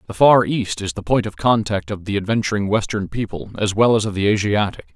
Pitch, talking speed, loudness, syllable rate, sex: 105 Hz, 230 wpm, -19 LUFS, 5.8 syllables/s, male